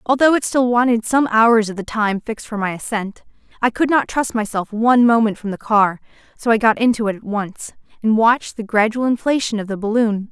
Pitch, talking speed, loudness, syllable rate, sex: 225 Hz, 220 wpm, -17 LUFS, 5.5 syllables/s, female